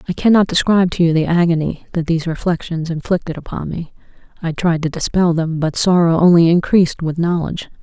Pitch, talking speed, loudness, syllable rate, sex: 170 Hz, 185 wpm, -16 LUFS, 6.0 syllables/s, female